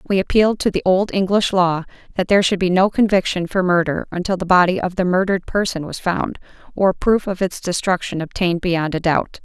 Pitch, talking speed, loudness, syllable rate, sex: 185 Hz, 210 wpm, -18 LUFS, 5.8 syllables/s, female